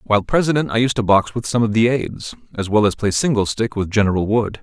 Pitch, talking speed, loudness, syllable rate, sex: 110 Hz, 260 wpm, -18 LUFS, 6.2 syllables/s, male